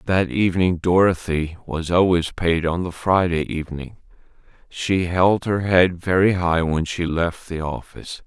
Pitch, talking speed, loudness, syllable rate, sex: 90 Hz, 155 wpm, -20 LUFS, 4.4 syllables/s, male